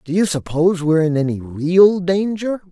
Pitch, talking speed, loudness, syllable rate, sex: 170 Hz, 200 wpm, -17 LUFS, 5.5 syllables/s, male